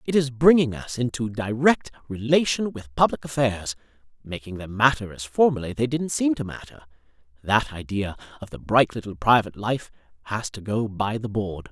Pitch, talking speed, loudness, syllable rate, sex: 115 Hz, 170 wpm, -23 LUFS, 5.3 syllables/s, male